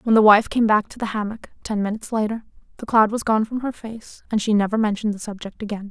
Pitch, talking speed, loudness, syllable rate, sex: 215 Hz, 255 wpm, -21 LUFS, 6.5 syllables/s, female